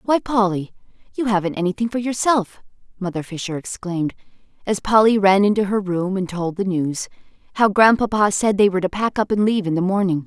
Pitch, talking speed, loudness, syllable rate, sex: 200 Hz, 185 wpm, -19 LUFS, 5.9 syllables/s, female